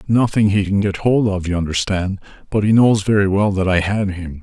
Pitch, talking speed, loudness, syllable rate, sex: 100 Hz, 230 wpm, -17 LUFS, 5.3 syllables/s, male